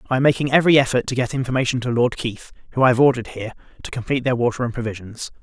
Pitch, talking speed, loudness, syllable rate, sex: 125 Hz, 245 wpm, -20 LUFS, 7.9 syllables/s, male